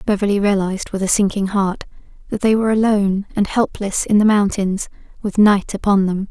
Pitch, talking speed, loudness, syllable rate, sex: 200 Hz, 180 wpm, -17 LUFS, 5.6 syllables/s, female